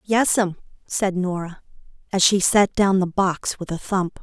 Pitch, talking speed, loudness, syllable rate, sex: 190 Hz, 170 wpm, -21 LUFS, 4.1 syllables/s, female